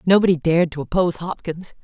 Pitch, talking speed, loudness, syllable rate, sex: 170 Hz, 165 wpm, -20 LUFS, 6.6 syllables/s, female